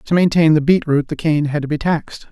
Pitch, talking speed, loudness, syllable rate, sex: 155 Hz, 285 wpm, -16 LUFS, 6.0 syllables/s, male